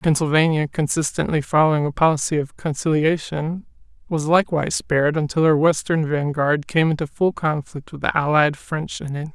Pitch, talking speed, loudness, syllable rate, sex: 155 Hz, 155 wpm, -20 LUFS, 5.4 syllables/s, male